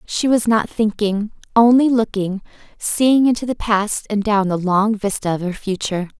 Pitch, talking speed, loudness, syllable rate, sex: 210 Hz, 175 wpm, -18 LUFS, 4.6 syllables/s, female